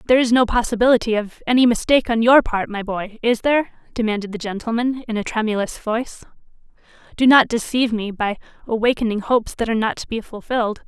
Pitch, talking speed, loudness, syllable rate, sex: 230 Hz, 190 wpm, -19 LUFS, 6.6 syllables/s, female